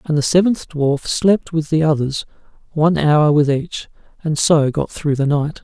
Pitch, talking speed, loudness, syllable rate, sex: 155 Hz, 190 wpm, -17 LUFS, 4.5 syllables/s, male